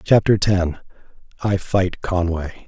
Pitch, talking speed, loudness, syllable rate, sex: 95 Hz, 90 wpm, -20 LUFS, 3.6 syllables/s, male